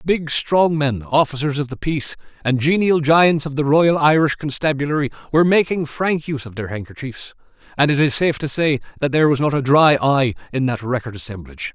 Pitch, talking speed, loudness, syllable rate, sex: 140 Hz, 200 wpm, -18 LUFS, 5.8 syllables/s, male